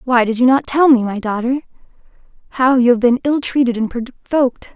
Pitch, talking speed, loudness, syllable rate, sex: 250 Hz, 200 wpm, -15 LUFS, 6.7 syllables/s, female